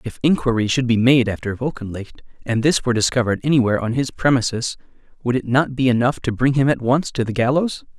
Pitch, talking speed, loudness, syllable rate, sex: 125 Hz, 210 wpm, -19 LUFS, 6.2 syllables/s, male